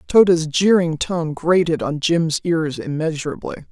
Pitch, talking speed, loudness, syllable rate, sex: 165 Hz, 130 wpm, -19 LUFS, 4.4 syllables/s, female